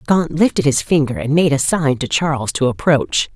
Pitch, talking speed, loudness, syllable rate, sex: 145 Hz, 215 wpm, -16 LUFS, 5.1 syllables/s, female